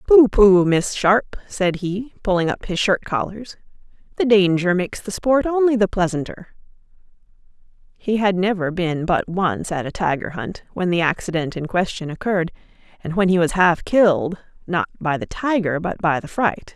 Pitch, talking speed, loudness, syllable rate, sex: 190 Hz, 170 wpm, -20 LUFS, 4.9 syllables/s, female